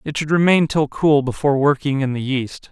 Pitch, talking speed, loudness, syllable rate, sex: 145 Hz, 220 wpm, -18 LUFS, 5.4 syllables/s, male